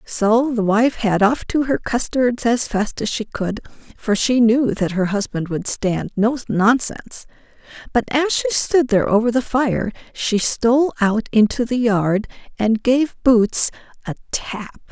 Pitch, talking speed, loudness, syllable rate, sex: 230 Hz, 170 wpm, -18 LUFS, 4.1 syllables/s, female